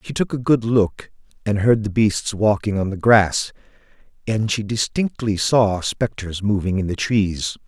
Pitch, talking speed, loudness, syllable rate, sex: 105 Hz, 170 wpm, -20 LUFS, 4.3 syllables/s, male